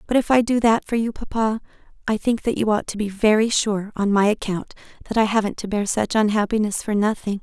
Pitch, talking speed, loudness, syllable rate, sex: 215 Hz, 235 wpm, -21 LUFS, 5.8 syllables/s, female